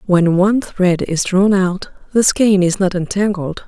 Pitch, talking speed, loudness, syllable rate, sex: 190 Hz, 180 wpm, -15 LUFS, 4.3 syllables/s, female